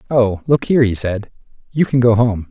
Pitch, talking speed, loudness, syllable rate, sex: 115 Hz, 215 wpm, -16 LUFS, 5.4 syllables/s, male